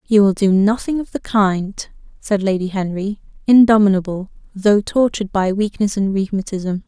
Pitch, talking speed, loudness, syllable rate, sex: 200 Hz, 150 wpm, -17 LUFS, 4.8 syllables/s, female